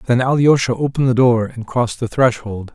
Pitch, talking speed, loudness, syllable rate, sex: 120 Hz, 195 wpm, -16 LUFS, 5.5 syllables/s, male